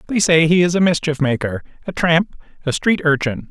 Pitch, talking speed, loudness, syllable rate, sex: 160 Hz, 205 wpm, -17 LUFS, 5.5 syllables/s, male